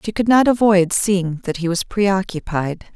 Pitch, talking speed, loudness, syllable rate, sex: 190 Hz, 185 wpm, -18 LUFS, 4.4 syllables/s, female